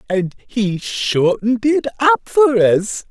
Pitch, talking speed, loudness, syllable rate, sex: 205 Hz, 135 wpm, -16 LUFS, 3.4 syllables/s, male